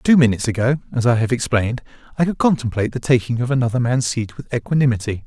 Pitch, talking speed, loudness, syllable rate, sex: 120 Hz, 205 wpm, -19 LUFS, 6.9 syllables/s, male